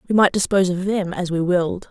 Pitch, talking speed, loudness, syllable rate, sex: 185 Hz, 250 wpm, -19 LUFS, 6.4 syllables/s, female